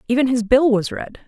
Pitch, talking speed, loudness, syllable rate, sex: 245 Hz, 235 wpm, -17 LUFS, 5.8 syllables/s, female